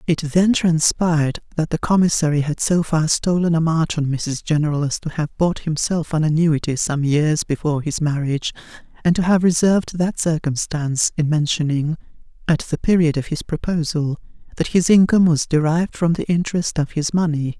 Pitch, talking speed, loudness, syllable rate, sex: 160 Hz, 175 wpm, -19 LUFS, 5.3 syllables/s, female